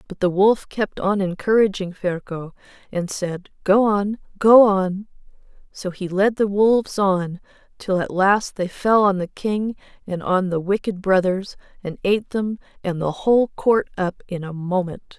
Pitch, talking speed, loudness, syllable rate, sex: 195 Hz, 170 wpm, -20 LUFS, 4.3 syllables/s, female